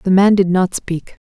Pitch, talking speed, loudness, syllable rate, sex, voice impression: 185 Hz, 240 wpm, -15 LUFS, 4.4 syllables/s, female, feminine, adult-like, slightly relaxed, slightly weak, muffled, slightly intellectual, calm, friendly, reassuring, elegant, kind, modest